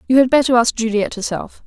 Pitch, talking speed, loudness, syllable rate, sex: 240 Hz, 215 wpm, -16 LUFS, 6.1 syllables/s, female